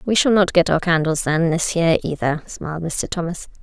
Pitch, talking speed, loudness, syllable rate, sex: 170 Hz, 215 wpm, -19 LUFS, 5.1 syllables/s, female